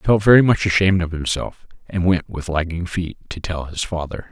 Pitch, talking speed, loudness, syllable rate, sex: 90 Hz, 220 wpm, -19 LUFS, 5.8 syllables/s, male